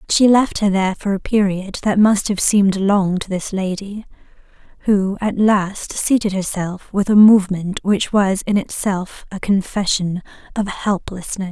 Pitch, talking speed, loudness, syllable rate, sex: 195 Hz, 160 wpm, -17 LUFS, 4.4 syllables/s, female